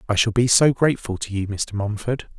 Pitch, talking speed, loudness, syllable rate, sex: 110 Hz, 225 wpm, -21 LUFS, 5.7 syllables/s, male